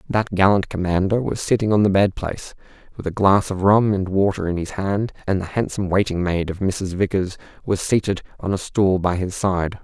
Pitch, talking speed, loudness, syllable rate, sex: 95 Hz, 215 wpm, -20 LUFS, 5.3 syllables/s, male